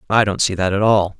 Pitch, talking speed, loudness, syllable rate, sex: 100 Hz, 300 wpm, -17 LUFS, 5.9 syllables/s, male